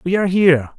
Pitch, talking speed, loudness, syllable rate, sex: 170 Hz, 230 wpm, -15 LUFS, 8.1 syllables/s, male